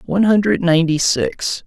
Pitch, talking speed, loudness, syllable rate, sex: 175 Hz, 145 wpm, -16 LUFS, 5.3 syllables/s, male